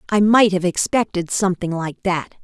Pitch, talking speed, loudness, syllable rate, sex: 185 Hz, 170 wpm, -18 LUFS, 5.1 syllables/s, female